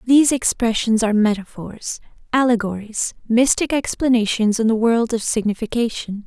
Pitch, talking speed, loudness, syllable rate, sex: 230 Hz, 115 wpm, -19 LUFS, 5.1 syllables/s, female